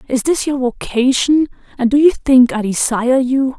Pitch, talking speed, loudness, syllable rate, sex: 260 Hz, 185 wpm, -14 LUFS, 4.8 syllables/s, female